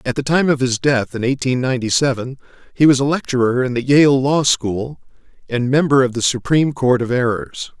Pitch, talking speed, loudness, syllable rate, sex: 130 Hz, 210 wpm, -16 LUFS, 5.4 syllables/s, male